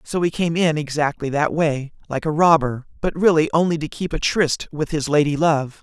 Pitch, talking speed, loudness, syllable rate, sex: 155 Hz, 215 wpm, -20 LUFS, 5.0 syllables/s, male